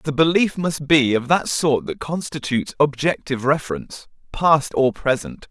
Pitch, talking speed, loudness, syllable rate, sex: 145 Hz, 155 wpm, -20 LUFS, 4.8 syllables/s, male